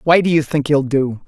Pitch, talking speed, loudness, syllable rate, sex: 145 Hz, 285 wpm, -16 LUFS, 5.2 syllables/s, male